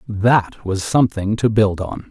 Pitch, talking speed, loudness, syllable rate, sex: 105 Hz, 170 wpm, -18 LUFS, 4.1 syllables/s, male